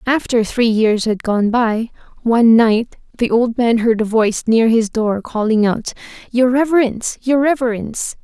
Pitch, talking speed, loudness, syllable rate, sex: 230 Hz, 170 wpm, -16 LUFS, 4.6 syllables/s, female